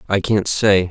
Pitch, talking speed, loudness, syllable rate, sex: 100 Hz, 200 wpm, -17 LUFS, 4.1 syllables/s, male